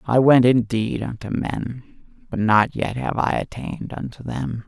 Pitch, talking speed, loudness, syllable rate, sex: 120 Hz, 165 wpm, -21 LUFS, 4.3 syllables/s, male